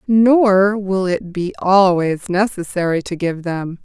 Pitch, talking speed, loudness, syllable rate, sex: 190 Hz, 140 wpm, -16 LUFS, 3.6 syllables/s, female